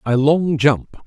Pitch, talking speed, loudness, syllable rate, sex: 140 Hz, 170 wpm, -17 LUFS, 3.1 syllables/s, male